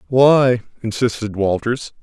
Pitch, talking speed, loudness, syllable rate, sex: 120 Hz, 90 wpm, -17 LUFS, 3.8 syllables/s, male